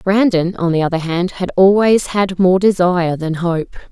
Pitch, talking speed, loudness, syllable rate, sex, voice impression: 180 Hz, 185 wpm, -15 LUFS, 4.6 syllables/s, female, feminine, adult-like, tensed, slightly dark, slightly hard, clear, fluent, intellectual, calm, slightly unique, elegant, strict, sharp